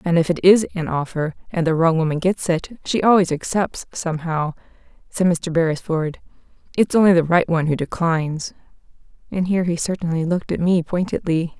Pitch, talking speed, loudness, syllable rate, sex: 170 Hz, 175 wpm, -20 LUFS, 5.6 syllables/s, female